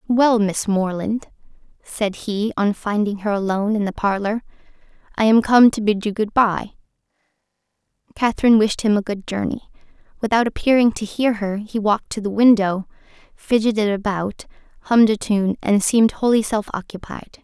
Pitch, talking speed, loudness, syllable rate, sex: 210 Hz, 160 wpm, -19 LUFS, 5.3 syllables/s, female